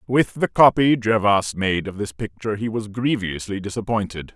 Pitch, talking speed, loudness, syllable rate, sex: 105 Hz, 165 wpm, -21 LUFS, 5.0 syllables/s, male